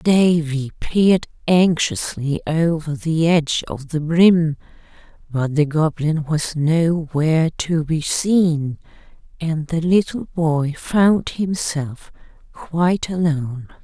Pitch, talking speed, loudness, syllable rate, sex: 160 Hz, 110 wpm, -19 LUFS, 3.4 syllables/s, female